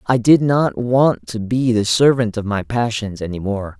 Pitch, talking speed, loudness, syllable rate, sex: 115 Hz, 205 wpm, -17 LUFS, 4.4 syllables/s, male